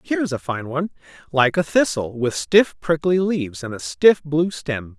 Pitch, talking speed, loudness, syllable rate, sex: 150 Hz, 205 wpm, -20 LUFS, 5.0 syllables/s, male